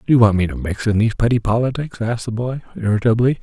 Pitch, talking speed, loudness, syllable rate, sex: 115 Hz, 245 wpm, -18 LUFS, 7.2 syllables/s, male